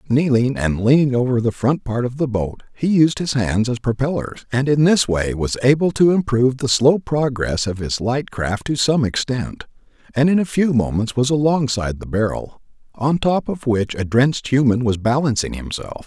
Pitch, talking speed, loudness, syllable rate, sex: 125 Hz, 200 wpm, -18 LUFS, 4.9 syllables/s, male